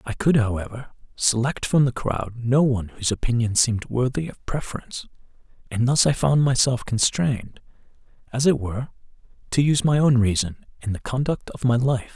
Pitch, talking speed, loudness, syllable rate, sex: 125 Hz, 175 wpm, -22 LUFS, 5.6 syllables/s, male